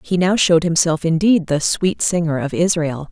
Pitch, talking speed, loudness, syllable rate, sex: 170 Hz, 190 wpm, -17 LUFS, 5.0 syllables/s, female